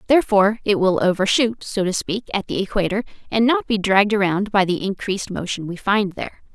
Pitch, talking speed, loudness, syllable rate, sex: 200 Hz, 200 wpm, -20 LUFS, 6.0 syllables/s, female